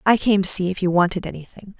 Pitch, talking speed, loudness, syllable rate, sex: 185 Hz, 265 wpm, -19 LUFS, 6.6 syllables/s, female